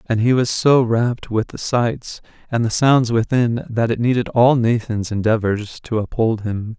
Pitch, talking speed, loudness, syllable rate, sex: 115 Hz, 185 wpm, -18 LUFS, 4.3 syllables/s, male